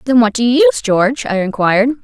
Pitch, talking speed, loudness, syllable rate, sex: 240 Hz, 235 wpm, -13 LUFS, 6.8 syllables/s, female